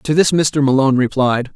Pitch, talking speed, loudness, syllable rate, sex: 140 Hz, 190 wpm, -15 LUFS, 5.4 syllables/s, male